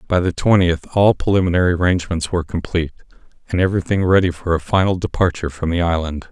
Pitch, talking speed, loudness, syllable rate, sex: 90 Hz, 170 wpm, -18 LUFS, 7.0 syllables/s, male